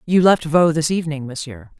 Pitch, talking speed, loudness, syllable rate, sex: 155 Hz, 200 wpm, -18 LUFS, 5.6 syllables/s, female